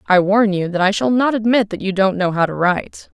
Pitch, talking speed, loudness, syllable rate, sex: 200 Hz, 280 wpm, -17 LUFS, 5.7 syllables/s, female